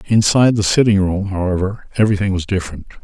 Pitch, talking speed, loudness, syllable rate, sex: 100 Hz, 160 wpm, -16 LUFS, 6.9 syllables/s, male